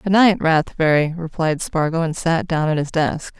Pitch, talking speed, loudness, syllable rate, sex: 165 Hz, 195 wpm, -19 LUFS, 4.6 syllables/s, female